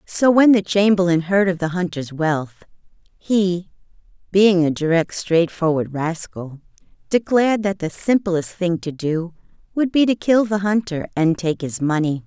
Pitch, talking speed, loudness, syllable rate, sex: 180 Hz, 145 wpm, -19 LUFS, 4.4 syllables/s, female